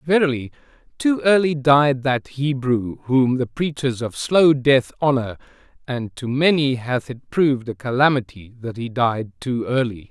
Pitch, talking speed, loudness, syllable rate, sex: 130 Hz, 155 wpm, -20 LUFS, 4.3 syllables/s, male